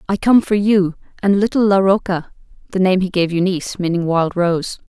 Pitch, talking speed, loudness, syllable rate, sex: 185 Hz, 185 wpm, -17 LUFS, 3.3 syllables/s, female